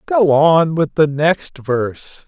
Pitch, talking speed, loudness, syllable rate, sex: 155 Hz, 160 wpm, -15 LUFS, 3.3 syllables/s, male